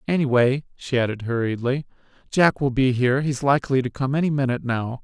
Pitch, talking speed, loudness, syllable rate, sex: 130 Hz, 180 wpm, -22 LUFS, 6.1 syllables/s, male